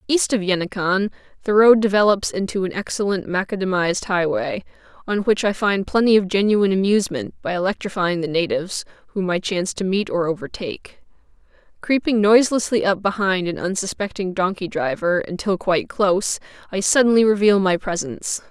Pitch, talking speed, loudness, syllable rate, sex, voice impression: 195 Hz, 150 wpm, -20 LUFS, 5.7 syllables/s, female, feminine, adult-like, slightly intellectual, reassuring, elegant